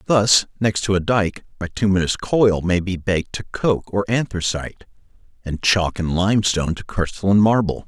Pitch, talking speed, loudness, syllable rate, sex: 95 Hz, 160 wpm, -19 LUFS, 5.1 syllables/s, male